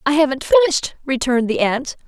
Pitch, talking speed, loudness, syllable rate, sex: 280 Hz, 175 wpm, -17 LUFS, 6.1 syllables/s, female